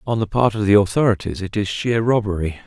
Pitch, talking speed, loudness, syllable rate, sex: 105 Hz, 225 wpm, -19 LUFS, 6.0 syllables/s, male